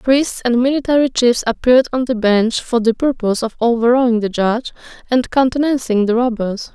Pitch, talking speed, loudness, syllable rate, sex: 240 Hz, 170 wpm, -16 LUFS, 5.5 syllables/s, female